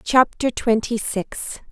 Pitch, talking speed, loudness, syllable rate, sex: 230 Hz, 105 wpm, -21 LUFS, 3.3 syllables/s, female